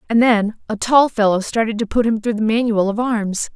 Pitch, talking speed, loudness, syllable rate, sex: 220 Hz, 235 wpm, -17 LUFS, 5.2 syllables/s, female